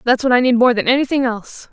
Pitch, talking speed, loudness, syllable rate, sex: 250 Hz, 280 wpm, -15 LUFS, 6.9 syllables/s, female